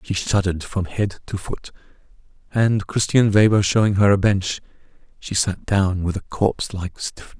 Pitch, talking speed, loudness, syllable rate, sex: 100 Hz, 170 wpm, -20 LUFS, 4.8 syllables/s, male